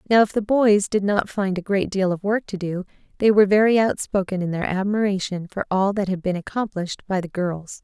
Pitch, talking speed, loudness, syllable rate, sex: 195 Hz, 230 wpm, -21 LUFS, 5.5 syllables/s, female